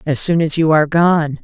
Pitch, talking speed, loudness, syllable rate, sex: 155 Hz, 250 wpm, -14 LUFS, 5.4 syllables/s, female